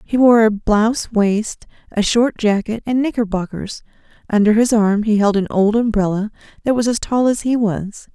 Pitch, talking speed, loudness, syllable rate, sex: 215 Hz, 185 wpm, -17 LUFS, 4.8 syllables/s, female